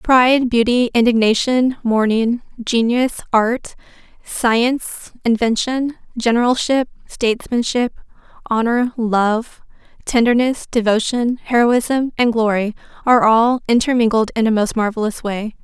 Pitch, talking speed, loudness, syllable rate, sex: 235 Hz, 95 wpm, -17 LUFS, 4.3 syllables/s, female